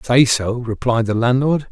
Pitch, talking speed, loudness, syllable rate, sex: 120 Hz, 175 wpm, -17 LUFS, 4.4 syllables/s, male